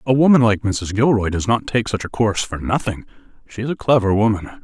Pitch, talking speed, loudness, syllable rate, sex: 110 Hz, 220 wpm, -18 LUFS, 5.8 syllables/s, male